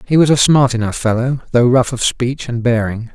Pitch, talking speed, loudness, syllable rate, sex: 125 Hz, 230 wpm, -15 LUFS, 5.1 syllables/s, male